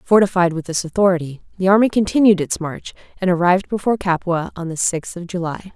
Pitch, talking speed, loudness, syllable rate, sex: 180 Hz, 190 wpm, -18 LUFS, 6.1 syllables/s, female